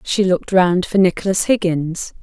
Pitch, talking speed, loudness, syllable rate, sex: 185 Hz, 160 wpm, -17 LUFS, 4.8 syllables/s, female